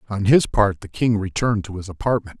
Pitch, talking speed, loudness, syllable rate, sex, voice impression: 105 Hz, 225 wpm, -20 LUFS, 5.9 syllables/s, male, masculine, adult-like, thick, tensed, slightly weak, hard, slightly muffled, cool, intellectual, calm, reassuring, wild, lively, slightly strict